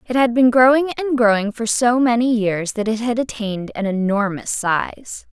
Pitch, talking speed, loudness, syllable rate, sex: 230 Hz, 190 wpm, -18 LUFS, 4.7 syllables/s, female